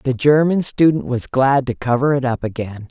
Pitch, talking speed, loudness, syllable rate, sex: 130 Hz, 205 wpm, -17 LUFS, 5.0 syllables/s, female